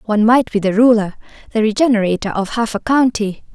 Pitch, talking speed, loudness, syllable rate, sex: 220 Hz, 185 wpm, -15 LUFS, 6.0 syllables/s, female